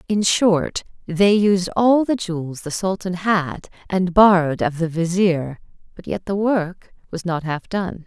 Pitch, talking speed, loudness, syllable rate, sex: 185 Hz, 170 wpm, -19 LUFS, 4.1 syllables/s, female